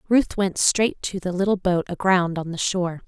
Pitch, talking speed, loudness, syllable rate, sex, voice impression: 185 Hz, 215 wpm, -22 LUFS, 4.9 syllables/s, female, very feminine, slightly young, slightly adult-like, thin, tensed, slightly powerful, bright, very hard, very clear, fluent, cute, slightly cool, intellectual, very refreshing, slightly sincere, slightly calm, friendly, reassuring, unique, slightly elegant, wild, slightly sweet, very lively, strict, intense, slightly light